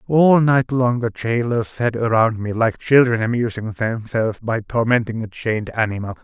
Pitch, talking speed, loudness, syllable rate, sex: 115 Hz, 165 wpm, -19 LUFS, 4.8 syllables/s, male